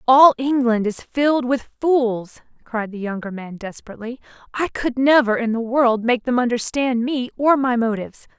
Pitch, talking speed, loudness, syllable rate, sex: 245 Hz, 170 wpm, -19 LUFS, 4.8 syllables/s, female